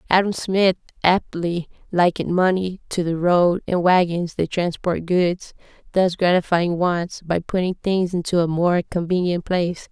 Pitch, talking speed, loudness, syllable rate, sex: 175 Hz, 145 wpm, -20 LUFS, 4.4 syllables/s, female